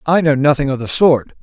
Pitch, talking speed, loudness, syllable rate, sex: 145 Hz, 250 wpm, -14 LUFS, 5.6 syllables/s, male